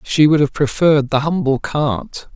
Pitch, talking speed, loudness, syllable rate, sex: 145 Hz, 180 wpm, -16 LUFS, 4.5 syllables/s, male